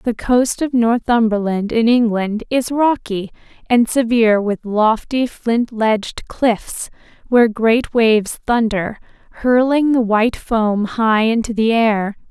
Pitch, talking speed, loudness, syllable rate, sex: 230 Hz, 130 wpm, -16 LUFS, 3.9 syllables/s, female